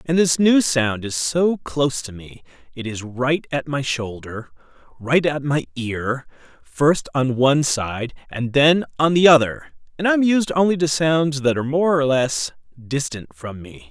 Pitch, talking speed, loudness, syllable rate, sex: 140 Hz, 185 wpm, -19 LUFS, 4.3 syllables/s, male